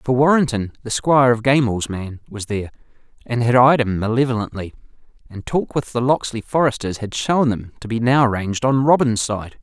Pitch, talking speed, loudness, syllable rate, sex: 120 Hz, 185 wpm, -18 LUFS, 5.4 syllables/s, male